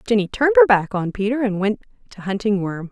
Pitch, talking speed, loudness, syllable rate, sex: 205 Hz, 225 wpm, -19 LUFS, 6.2 syllables/s, female